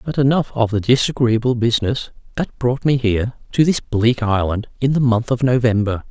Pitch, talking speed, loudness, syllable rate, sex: 120 Hz, 185 wpm, -18 LUFS, 5.3 syllables/s, male